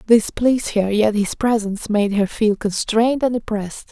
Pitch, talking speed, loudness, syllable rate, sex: 215 Hz, 185 wpm, -19 LUFS, 5.1 syllables/s, female